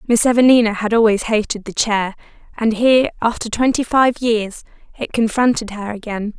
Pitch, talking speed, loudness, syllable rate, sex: 225 Hz, 160 wpm, -17 LUFS, 5.3 syllables/s, female